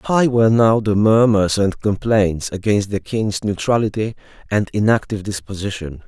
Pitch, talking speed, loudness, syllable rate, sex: 105 Hz, 140 wpm, -18 LUFS, 4.8 syllables/s, male